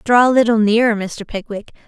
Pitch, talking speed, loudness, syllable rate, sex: 220 Hz, 190 wpm, -15 LUFS, 5.5 syllables/s, female